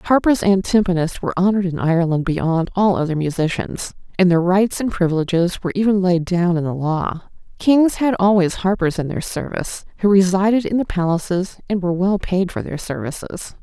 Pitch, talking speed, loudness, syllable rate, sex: 185 Hz, 185 wpm, -18 LUFS, 5.5 syllables/s, female